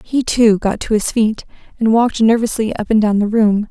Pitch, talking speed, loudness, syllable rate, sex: 220 Hz, 225 wpm, -15 LUFS, 5.2 syllables/s, female